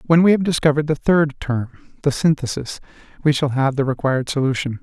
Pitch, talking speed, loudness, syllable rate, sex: 145 Hz, 185 wpm, -19 LUFS, 6.2 syllables/s, male